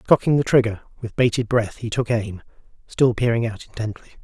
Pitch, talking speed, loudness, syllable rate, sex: 115 Hz, 185 wpm, -21 LUFS, 5.7 syllables/s, male